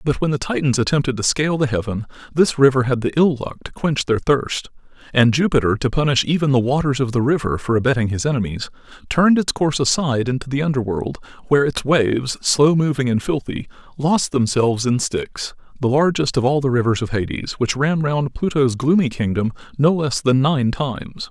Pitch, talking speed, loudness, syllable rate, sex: 135 Hz, 200 wpm, -19 LUFS, 5.6 syllables/s, male